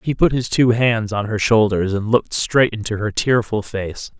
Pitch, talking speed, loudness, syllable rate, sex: 110 Hz, 215 wpm, -18 LUFS, 4.7 syllables/s, male